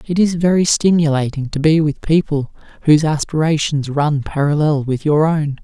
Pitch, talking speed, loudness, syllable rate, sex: 150 Hz, 160 wpm, -16 LUFS, 5.0 syllables/s, male